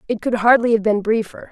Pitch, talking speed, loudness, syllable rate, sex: 220 Hz, 235 wpm, -17 LUFS, 6.0 syllables/s, female